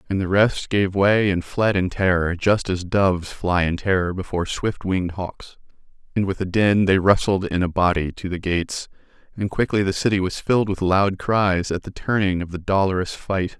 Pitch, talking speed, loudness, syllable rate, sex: 95 Hz, 205 wpm, -21 LUFS, 5.0 syllables/s, male